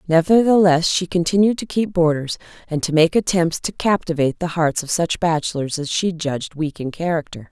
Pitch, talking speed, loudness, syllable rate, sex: 170 Hz, 185 wpm, -19 LUFS, 5.4 syllables/s, female